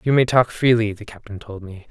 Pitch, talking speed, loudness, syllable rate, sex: 110 Hz, 250 wpm, -18 LUFS, 5.6 syllables/s, male